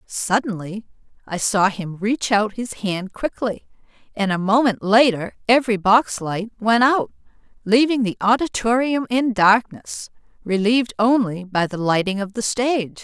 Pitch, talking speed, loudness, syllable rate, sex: 215 Hz, 145 wpm, -19 LUFS, 4.4 syllables/s, female